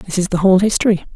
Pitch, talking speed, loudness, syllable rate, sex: 190 Hz, 260 wpm, -15 LUFS, 7.6 syllables/s, female